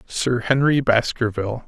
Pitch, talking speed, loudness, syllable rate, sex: 120 Hz, 105 wpm, -20 LUFS, 4.6 syllables/s, male